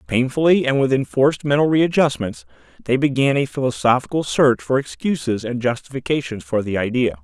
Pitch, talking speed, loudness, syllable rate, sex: 130 Hz, 150 wpm, -19 LUFS, 5.5 syllables/s, male